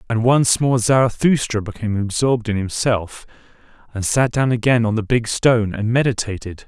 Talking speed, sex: 160 wpm, male